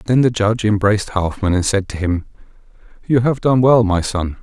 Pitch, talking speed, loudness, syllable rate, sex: 105 Hz, 205 wpm, -16 LUFS, 5.3 syllables/s, male